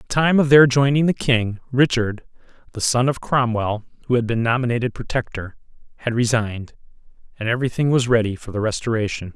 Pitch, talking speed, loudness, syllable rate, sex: 120 Hz, 180 wpm, -20 LUFS, 5.9 syllables/s, male